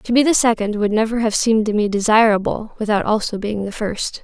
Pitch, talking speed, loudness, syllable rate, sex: 215 Hz, 225 wpm, -18 LUFS, 5.8 syllables/s, female